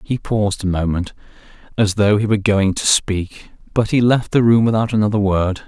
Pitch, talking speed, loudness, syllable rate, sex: 105 Hz, 200 wpm, -17 LUFS, 5.3 syllables/s, male